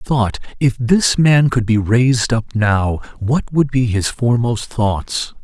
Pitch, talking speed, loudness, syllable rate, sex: 120 Hz, 175 wpm, -16 LUFS, 4.0 syllables/s, male